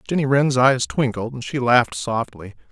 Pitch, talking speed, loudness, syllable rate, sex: 120 Hz, 175 wpm, -19 LUFS, 4.9 syllables/s, male